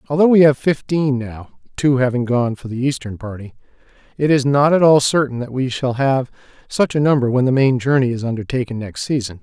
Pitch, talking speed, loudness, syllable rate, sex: 130 Hz, 210 wpm, -17 LUFS, 4.7 syllables/s, male